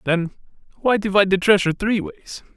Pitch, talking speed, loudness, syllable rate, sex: 185 Hz, 140 wpm, -19 LUFS, 5.9 syllables/s, male